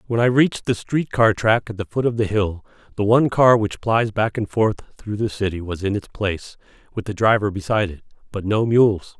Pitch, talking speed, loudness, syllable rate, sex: 105 Hz, 235 wpm, -20 LUFS, 5.5 syllables/s, male